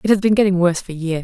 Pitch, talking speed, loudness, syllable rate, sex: 185 Hz, 340 wpm, -17 LUFS, 7.6 syllables/s, female